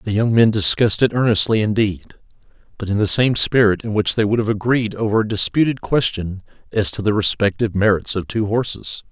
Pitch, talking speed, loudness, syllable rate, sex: 110 Hz, 195 wpm, -17 LUFS, 5.7 syllables/s, male